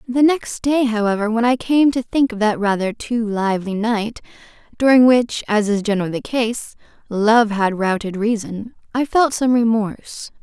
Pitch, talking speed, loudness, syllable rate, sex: 225 Hz, 175 wpm, -18 LUFS, 4.8 syllables/s, female